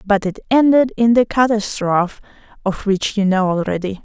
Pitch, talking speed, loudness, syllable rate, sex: 210 Hz, 165 wpm, -17 LUFS, 5.1 syllables/s, female